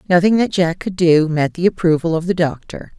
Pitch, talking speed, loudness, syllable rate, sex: 170 Hz, 220 wpm, -16 LUFS, 5.4 syllables/s, female